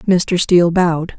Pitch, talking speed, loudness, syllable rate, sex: 175 Hz, 150 wpm, -14 LUFS, 4.4 syllables/s, female